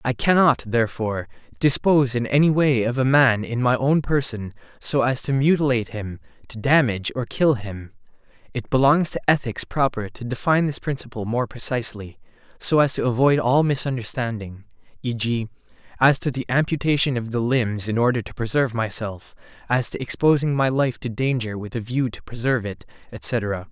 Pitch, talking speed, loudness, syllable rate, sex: 125 Hz, 175 wpm, -21 LUFS, 5.4 syllables/s, male